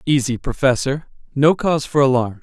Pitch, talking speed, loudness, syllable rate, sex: 135 Hz, 150 wpm, -18 LUFS, 5.3 syllables/s, male